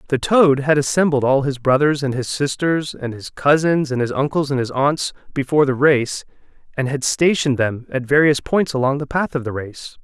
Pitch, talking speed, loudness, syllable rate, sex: 140 Hz, 210 wpm, -18 LUFS, 5.2 syllables/s, male